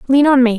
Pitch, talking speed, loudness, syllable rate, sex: 255 Hz, 310 wpm, -12 LUFS, 7.0 syllables/s, female